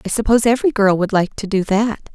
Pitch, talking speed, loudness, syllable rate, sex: 210 Hz, 250 wpm, -17 LUFS, 6.4 syllables/s, female